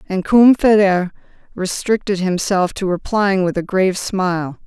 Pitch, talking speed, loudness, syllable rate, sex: 190 Hz, 130 wpm, -16 LUFS, 4.7 syllables/s, female